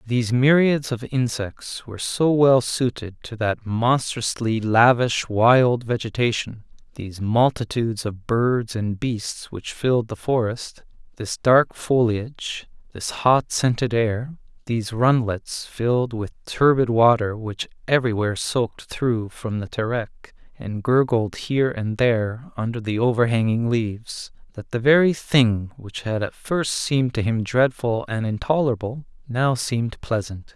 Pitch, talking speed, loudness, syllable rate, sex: 120 Hz, 135 wpm, -21 LUFS, 4.2 syllables/s, male